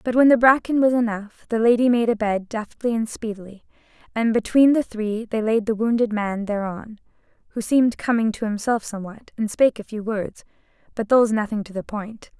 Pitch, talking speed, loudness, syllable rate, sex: 225 Hz, 200 wpm, -21 LUFS, 5.5 syllables/s, female